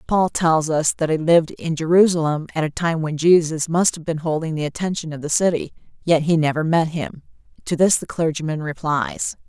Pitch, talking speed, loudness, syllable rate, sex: 160 Hz, 205 wpm, -20 LUFS, 5.3 syllables/s, female